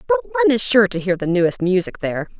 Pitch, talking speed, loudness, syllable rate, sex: 205 Hz, 250 wpm, -18 LUFS, 6.6 syllables/s, female